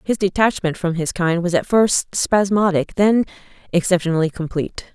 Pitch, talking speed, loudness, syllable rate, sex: 180 Hz, 145 wpm, -19 LUFS, 5.0 syllables/s, female